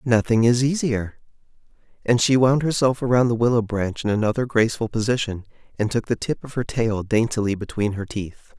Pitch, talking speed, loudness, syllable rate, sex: 115 Hz, 180 wpm, -21 LUFS, 5.5 syllables/s, male